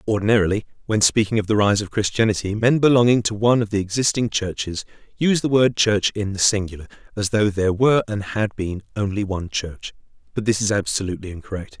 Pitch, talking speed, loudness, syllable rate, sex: 105 Hz, 195 wpm, -20 LUFS, 6.3 syllables/s, male